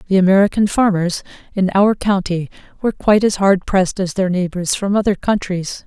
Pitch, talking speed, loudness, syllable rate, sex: 190 Hz, 175 wpm, -16 LUFS, 5.5 syllables/s, female